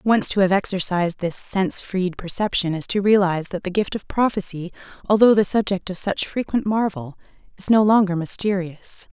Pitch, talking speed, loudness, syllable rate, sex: 190 Hz, 175 wpm, -20 LUFS, 5.3 syllables/s, female